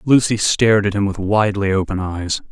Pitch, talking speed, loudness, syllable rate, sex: 100 Hz, 190 wpm, -17 LUFS, 5.5 syllables/s, male